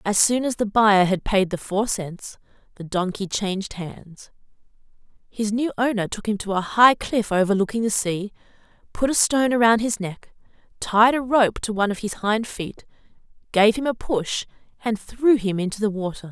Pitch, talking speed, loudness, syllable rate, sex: 210 Hz, 190 wpm, -21 LUFS, 4.9 syllables/s, female